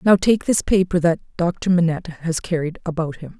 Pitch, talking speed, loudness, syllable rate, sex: 170 Hz, 195 wpm, -20 LUFS, 5.5 syllables/s, female